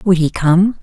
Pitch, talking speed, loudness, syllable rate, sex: 180 Hz, 215 wpm, -14 LUFS, 3.9 syllables/s, female